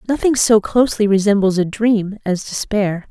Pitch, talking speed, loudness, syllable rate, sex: 210 Hz, 155 wpm, -16 LUFS, 4.9 syllables/s, female